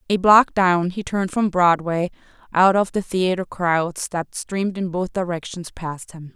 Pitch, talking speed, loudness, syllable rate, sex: 180 Hz, 180 wpm, -20 LUFS, 4.4 syllables/s, female